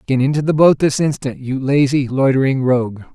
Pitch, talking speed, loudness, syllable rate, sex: 135 Hz, 190 wpm, -16 LUFS, 5.5 syllables/s, male